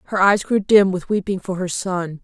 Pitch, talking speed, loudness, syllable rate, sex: 190 Hz, 240 wpm, -19 LUFS, 5.0 syllables/s, female